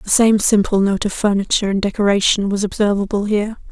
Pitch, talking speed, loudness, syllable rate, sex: 205 Hz, 180 wpm, -16 LUFS, 6.1 syllables/s, female